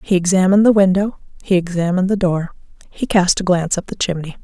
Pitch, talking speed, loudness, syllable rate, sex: 185 Hz, 205 wpm, -16 LUFS, 6.4 syllables/s, female